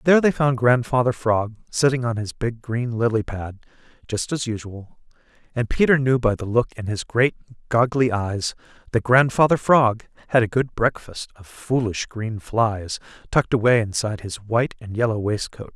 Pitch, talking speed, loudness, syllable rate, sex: 115 Hz, 170 wpm, -21 LUFS, 4.8 syllables/s, male